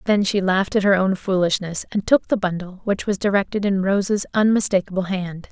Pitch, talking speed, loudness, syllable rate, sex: 195 Hz, 195 wpm, -20 LUFS, 5.6 syllables/s, female